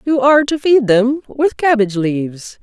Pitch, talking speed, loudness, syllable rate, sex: 250 Hz, 185 wpm, -14 LUFS, 4.9 syllables/s, female